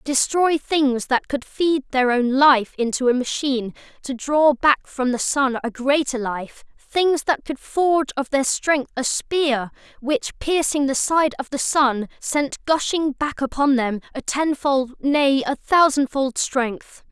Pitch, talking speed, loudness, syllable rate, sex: 275 Hz, 160 wpm, -20 LUFS, 3.8 syllables/s, female